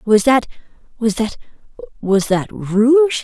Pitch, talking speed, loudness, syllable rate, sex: 230 Hz, 95 wpm, -16 LUFS, 4.1 syllables/s, female